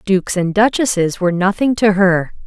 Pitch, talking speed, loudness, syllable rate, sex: 195 Hz, 170 wpm, -15 LUFS, 5.3 syllables/s, female